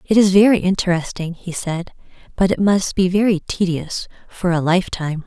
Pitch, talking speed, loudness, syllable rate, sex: 180 Hz, 170 wpm, -18 LUFS, 5.3 syllables/s, female